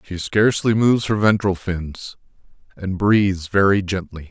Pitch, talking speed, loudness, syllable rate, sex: 95 Hz, 140 wpm, -19 LUFS, 4.8 syllables/s, male